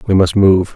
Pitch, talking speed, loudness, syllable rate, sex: 95 Hz, 240 wpm, -12 LUFS, 4.9 syllables/s, male